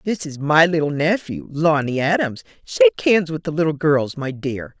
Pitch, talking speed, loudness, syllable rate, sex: 160 Hz, 175 wpm, -19 LUFS, 5.1 syllables/s, female